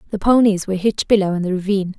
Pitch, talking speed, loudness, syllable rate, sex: 195 Hz, 240 wpm, -17 LUFS, 8.0 syllables/s, female